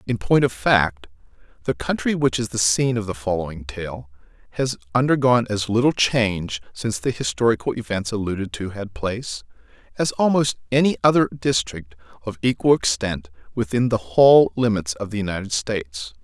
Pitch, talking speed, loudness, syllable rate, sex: 105 Hz, 160 wpm, -21 LUFS, 5.4 syllables/s, male